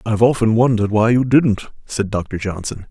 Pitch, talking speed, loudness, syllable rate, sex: 110 Hz, 185 wpm, -17 LUFS, 5.9 syllables/s, male